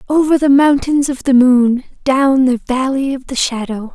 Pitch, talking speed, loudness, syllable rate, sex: 265 Hz, 180 wpm, -14 LUFS, 4.5 syllables/s, female